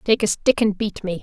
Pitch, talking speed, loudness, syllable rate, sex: 210 Hz, 295 wpm, -20 LUFS, 5.3 syllables/s, female